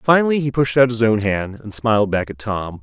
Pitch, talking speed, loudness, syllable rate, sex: 115 Hz, 255 wpm, -18 LUFS, 5.4 syllables/s, male